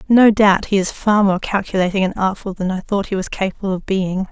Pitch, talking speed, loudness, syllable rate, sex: 195 Hz, 235 wpm, -17 LUFS, 5.6 syllables/s, female